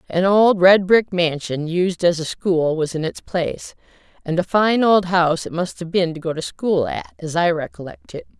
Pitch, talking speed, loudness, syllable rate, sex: 175 Hz, 220 wpm, -19 LUFS, 4.8 syllables/s, female